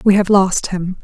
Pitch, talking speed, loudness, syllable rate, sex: 190 Hz, 235 wpm, -15 LUFS, 4.4 syllables/s, female